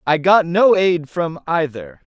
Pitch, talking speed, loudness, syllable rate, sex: 170 Hz, 170 wpm, -16 LUFS, 3.8 syllables/s, male